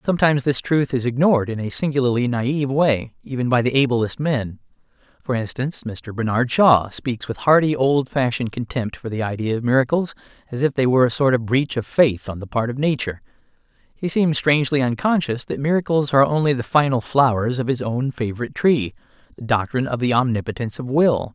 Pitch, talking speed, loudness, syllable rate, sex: 130 Hz, 190 wpm, -20 LUFS, 5.9 syllables/s, male